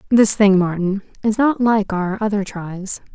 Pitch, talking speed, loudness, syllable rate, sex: 205 Hz, 170 wpm, -18 LUFS, 4.3 syllables/s, female